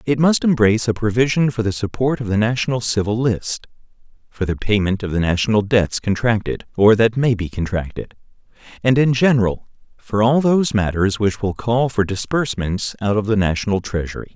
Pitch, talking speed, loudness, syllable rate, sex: 110 Hz, 180 wpm, -18 LUFS, 5.5 syllables/s, male